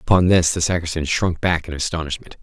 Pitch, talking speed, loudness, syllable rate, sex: 85 Hz, 200 wpm, -20 LUFS, 5.9 syllables/s, male